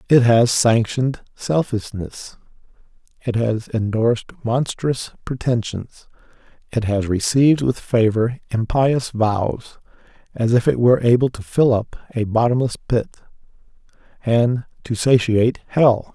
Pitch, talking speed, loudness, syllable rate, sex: 120 Hz, 115 wpm, -19 LUFS, 4.2 syllables/s, male